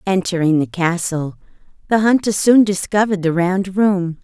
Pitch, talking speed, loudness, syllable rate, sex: 185 Hz, 140 wpm, -16 LUFS, 4.7 syllables/s, female